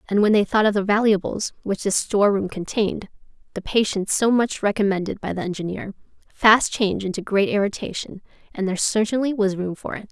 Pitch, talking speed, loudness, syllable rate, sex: 205 Hz, 185 wpm, -21 LUFS, 6.0 syllables/s, female